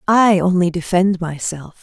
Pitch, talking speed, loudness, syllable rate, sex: 180 Hz, 130 wpm, -17 LUFS, 4.3 syllables/s, female